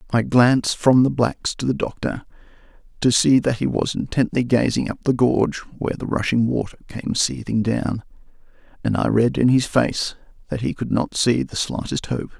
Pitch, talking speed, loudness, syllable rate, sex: 120 Hz, 190 wpm, -20 LUFS, 5.0 syllables/s, male